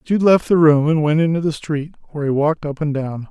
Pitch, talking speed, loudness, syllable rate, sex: 155 Hz, 270 wpm, -17 LUFS, 6.0 syllables/s, male